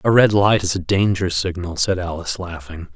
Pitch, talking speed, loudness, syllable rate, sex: 90 Hz, 205 wpm, -19 LUFS, 5.3 syllables/s, male